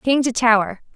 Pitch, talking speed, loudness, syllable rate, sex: 235 Hz, 190 wpm, -17 LUFS, 4.9 syllables/s, female